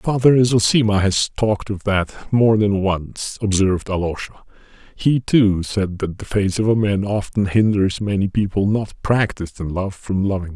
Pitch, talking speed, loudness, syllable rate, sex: 100 Hz, 175 wpm, -19 LUFS, 4.7 syllables/s, male